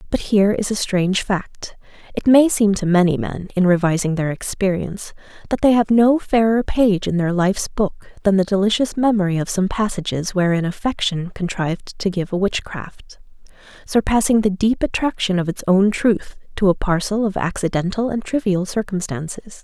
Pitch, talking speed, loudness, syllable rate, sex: 195 Hz, 170 wpm, -19 LUFS, 5.2 syllables/s, female